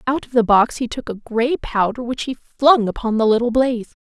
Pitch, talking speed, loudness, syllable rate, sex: 235 Hz, 235 wpm, -18 LUFS, 5.2 syllables/s, female